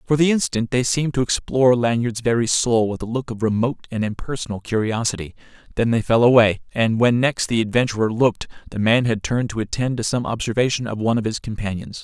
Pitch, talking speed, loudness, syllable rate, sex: 115 Hz, 210 wpm, -20 LUFS, 6.3 syllables/s, male